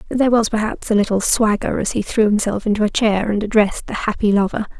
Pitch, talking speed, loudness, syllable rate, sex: 215 Hz, 225 wpm, -18 LUFS, 6.2 syllables/s, female